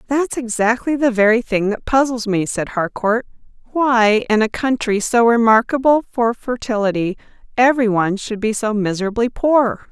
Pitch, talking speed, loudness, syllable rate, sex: 230 Hz, 150 wpm, -17 LUFS, 4.9 syllables/s, female